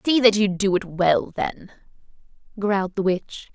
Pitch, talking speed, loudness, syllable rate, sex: 200 Hz, 170 wpm, -22 LUFS, 4.5 syllables/s, female